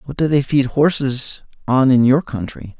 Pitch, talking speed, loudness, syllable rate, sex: 135 Hz, 195 wpm, -16 LUFS, 4.6 syllables/s, male